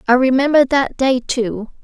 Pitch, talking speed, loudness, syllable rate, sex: 255 Hz, 165 wpm, -16 LUFS, 4.4 syllables/s, female